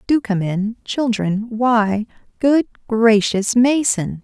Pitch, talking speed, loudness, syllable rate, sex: 225 Hz, 85 wpm, -18 LUFS, 3.2 syllables/s, female